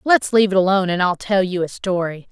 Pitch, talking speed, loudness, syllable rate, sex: 190 Hz, 260 wpm, -18 LUFS, 6.3 syllables/s, female